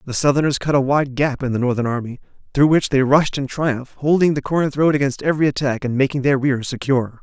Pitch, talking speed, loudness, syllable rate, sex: 135 Hz, 235 wpm, -18 LUFS, 6.1 syllables/s, male